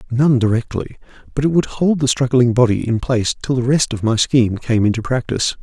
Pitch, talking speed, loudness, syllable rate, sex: 125 Hz, 215 wpm, -17 LUFS, 5.9 syllables/s, male